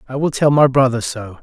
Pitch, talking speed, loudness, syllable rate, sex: 130 Hz, 250 wpm, -15 LUFS, 5.7 syllables/s, male